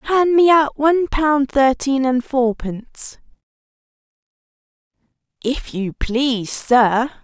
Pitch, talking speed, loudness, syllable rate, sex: 265 Hz, 100 wpm, -17 LUFS, 3.5 syllables/s, female